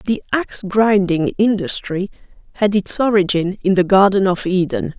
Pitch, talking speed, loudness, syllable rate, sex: 190 Hz, 145 wpm, -17 LUFS, 4.9 syllables/s, female